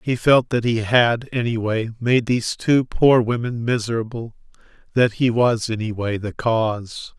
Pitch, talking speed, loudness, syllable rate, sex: 115 Hz, 150 wpm, -20 LUFS, 4.4 syllables/s, male